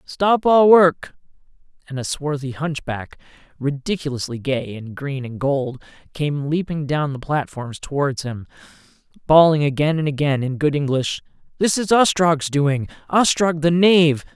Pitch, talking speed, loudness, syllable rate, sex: 150 Hz, 140 wpm, -19 LUFS, 4.4 syllables/s, male